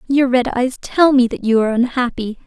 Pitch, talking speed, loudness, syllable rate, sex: 250 Hz, 220 wpm, -16 LUFS, 5.5 syllables/s, female